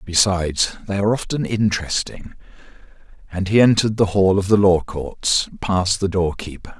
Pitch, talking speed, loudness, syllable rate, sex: 95 Hz, 150 wpm, -19 LUFS, 5.2 syllables/s, male